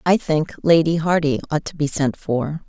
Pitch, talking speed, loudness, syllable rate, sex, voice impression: 155 Hz, 200 wpm, -20 LUFS, 4.7 syllables/s, female, slightly feminine, very gender-neutral, very adult-like, middle-aged, slightly thick, tensed, slightly weak, slightly bright, slightly hard, slightly raspy, very intellectual, very sincere, very calm, slightly wild, kind, slightly modest